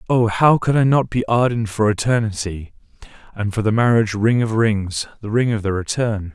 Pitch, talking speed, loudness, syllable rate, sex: 110 Hz, 190 wpm, -18 LUFS, 5.2 syllables/s, male